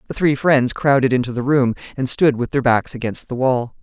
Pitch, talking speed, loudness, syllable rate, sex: 130 Hz, 235 wpm, -18 LUFS, 5.3 syllables/s, female